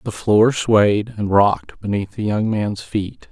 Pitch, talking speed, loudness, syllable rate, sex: 105 Hz, 180 wpm, -18 LUFS, 3.8 syllables/s, male